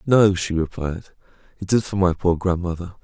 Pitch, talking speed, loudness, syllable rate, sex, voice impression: 90 Hz, 180 wpm, -21 LUFS, 4.9 syllables/s, male, very masculine, very middle-aged, very thick, slightly tensed, powerful, slightly dark, soft, slightly muffled, fluent, raspy, cool, very intellectual, refreshing, very sincere, very calm, mature, friendly, reassuring, unique, slightly elegant, slightly wild, sweet, lively, kind